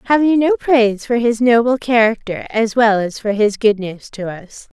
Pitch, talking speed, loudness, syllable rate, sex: 225 Hz, 200 wpm, -15 LUFS, 4.7 syllables/s, female